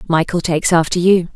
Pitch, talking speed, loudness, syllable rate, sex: 170 Hz, 175 wpm, -15 LUFS, 6.1 syllables/s, female